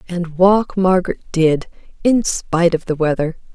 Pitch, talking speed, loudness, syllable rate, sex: 175 Hz, 150 wpm, -17 LUFS, 4.7 syllables/s, female